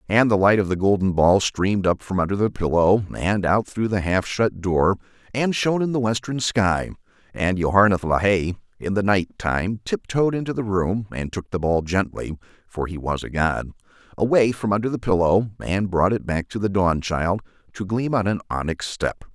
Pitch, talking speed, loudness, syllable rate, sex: 100 Hz, 205 wpm, -22 LUFS, 4.9 syllables/s, male